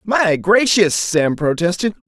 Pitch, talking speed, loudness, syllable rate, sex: 190 Hz, 115 wpm, -16 LUFS, 3.7 syllables/s, male